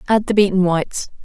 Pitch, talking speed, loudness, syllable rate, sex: 190 Hz, 195 wpm, -17 LUFS, 6.1 syllables/s, female